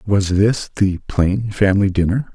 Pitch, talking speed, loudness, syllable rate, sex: 100 Hz, 155 wpm, -17 LUFS, 4.2 syllables/s, male